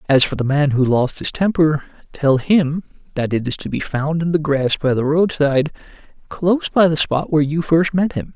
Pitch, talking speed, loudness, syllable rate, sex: 150 Hz, 225 wpm, -18 LUFS, 5.1 syllables/s, male